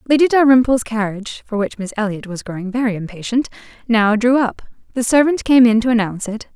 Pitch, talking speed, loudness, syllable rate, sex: 230 Hz, 190 wpm, -17 LUFS, 6.0 syllables/s, female